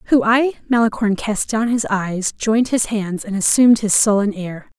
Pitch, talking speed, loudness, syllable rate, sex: 215 Hz, 190 wpm, -17 LUFS, 5.1 syllables/s, female